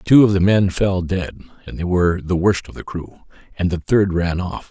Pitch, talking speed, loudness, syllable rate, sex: 90 Hz, 240 wpm, -18 LUFS, 5.1 syllables/s, male